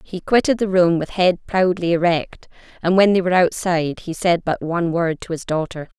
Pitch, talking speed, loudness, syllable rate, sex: 175 Hz, 210 wpm, -19 LUFS, 5.3 syllables/s, female